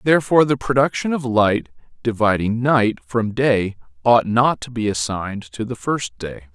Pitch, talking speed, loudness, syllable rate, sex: 115 Hz, 165 wpm, -19 LUFS, 4.7 syllables/s, male